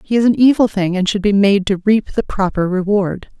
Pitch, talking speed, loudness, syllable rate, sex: 200 Hz, 245 wpm, -15 LUFS, 5.3 syllables/s, female